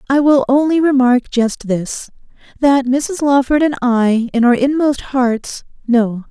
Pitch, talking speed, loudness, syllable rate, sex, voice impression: 260 Hz, 145 wpm, -14 LUFS, 3.8 syllables/s, female, very feminine, very adult-like, very thin, slightly tensed, powerful, slightly bright, slightly soft, slightly muffled, fluent, slightly raspy, cool, very intellectual, refreshing, sincere, slightly calm, friendly, reassuring, very unique, elegant, slightly wild, sweet, slightly lively, strict, modest, light